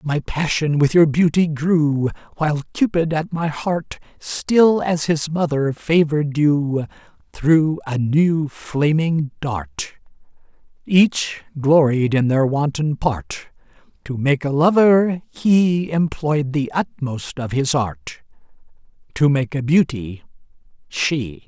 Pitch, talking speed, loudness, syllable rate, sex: 150 Hz, 125 wpm, -19 LUFS, 3.4 syllables/s, male